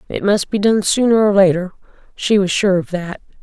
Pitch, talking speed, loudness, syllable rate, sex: 195 Hz, 195 wpm, -15 LUFS, 5.3 syllables/s, female